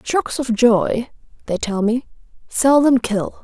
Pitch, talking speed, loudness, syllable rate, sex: 240 Hz, 140 wpm, -18 LUFS, 3.5 syllables/s, female